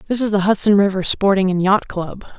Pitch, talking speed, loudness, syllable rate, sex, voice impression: 195 Hz, 225 wpm, -16 LUFS, 5.6 syllables/s, female, very feminine, adult-like, slightly fluent, friendly, slightly sweet